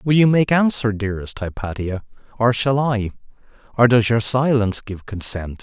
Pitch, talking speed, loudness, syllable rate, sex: 115 Hz, 150 wpm, -19 LUFS, 5.1 syllables/s, male